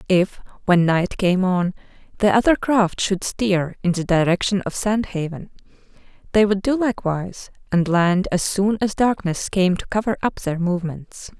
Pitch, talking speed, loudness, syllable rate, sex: 190 Hz, 170 wpm, -20 LUFS, 4.7 syllables/s, female